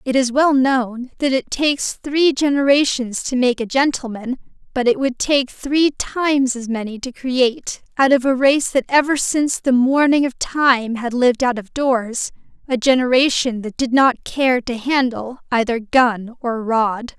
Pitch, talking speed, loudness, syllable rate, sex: 255 Hz, 180 wpm, -18 LUFS, 4.4 syllables/s, female